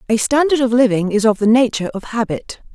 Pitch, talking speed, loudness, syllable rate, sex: 235 Hz, 220 wpm, -16 LUFS, 6.1 syllables/s, female